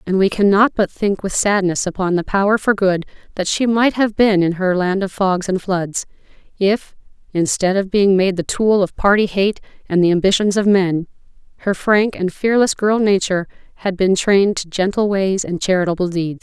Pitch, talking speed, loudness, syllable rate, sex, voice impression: 195 Hz, 195 wpm, -17 LUFS, 5.0 syllables/s, female, feminine, middle-aged, tensed, powerful, clear, fluent, intellectual, calm, slightly friendly, elegant, lively, strict, slightly sharp